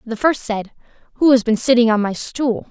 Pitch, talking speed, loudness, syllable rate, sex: 235 Hz, 220 wpm, -17 LUFS, 5.2 syllables/s, female